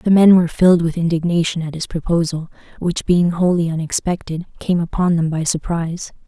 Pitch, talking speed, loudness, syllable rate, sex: 170 Hz, 170 wpm, -17 LUFS, 5.6 syllables/s, female